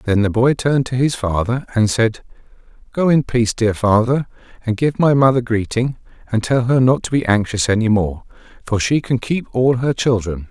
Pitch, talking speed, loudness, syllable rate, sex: 120 Hz, 200 wpm, -17 LUFS, 5.2 syllables/s, male